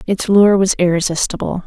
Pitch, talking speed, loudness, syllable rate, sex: 185 Hz, 145 wpm, -14 LUFS, 5.3 syllables/s, female